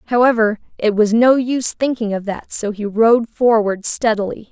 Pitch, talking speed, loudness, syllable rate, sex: 225 Hz, 175 wpm, -16 LUFS, 4.7 syllables/s, female